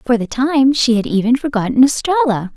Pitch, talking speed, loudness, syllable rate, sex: 255 Hz, 190 wpm, -15 LUFS, 5.4 syllables/s, female